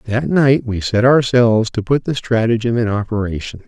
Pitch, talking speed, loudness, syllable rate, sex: 115 Hz, 180 wpm, -16 LUFS, 5.1 syllables/s, male